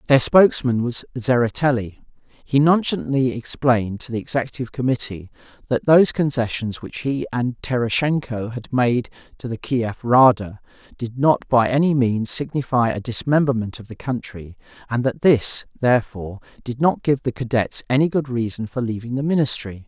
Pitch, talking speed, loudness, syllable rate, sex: 125 Hz, 155 wpm, -20 LUFS, 5.2 syllables/s, male